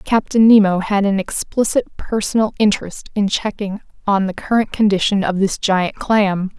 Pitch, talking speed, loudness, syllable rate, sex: 205 Hz, 155 wpm, -17 LUFS, 4.9 syllables/s, female